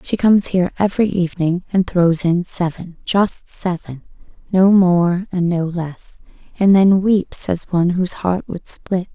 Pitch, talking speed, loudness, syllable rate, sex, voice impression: 180 Hz, 150 wpm, -17 LUFS, 4.4 syllables/s, female, feminine, slightly young, relaxed, weak, dark, soft, slightly cute, calm, reassuring, elegant, kind, modest